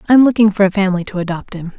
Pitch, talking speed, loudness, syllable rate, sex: 200 Hz, 305 wpm, -14 LUFS, 8.2 syllables/s, female